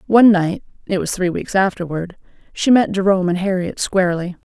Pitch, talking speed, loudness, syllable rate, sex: 190 Hz, 145 wpm, -17 LUFS, 5.7 syllables/s, female